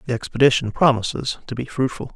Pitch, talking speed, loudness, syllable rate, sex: 125 Hz, 165 wpm, -20 LUFS, 6.3 syllables/s, male